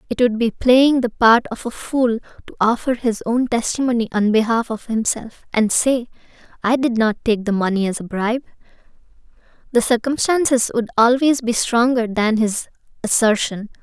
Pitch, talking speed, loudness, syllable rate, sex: 235 Hz, 165 wpm, -18 LUFS, 4.9 syllables/s, female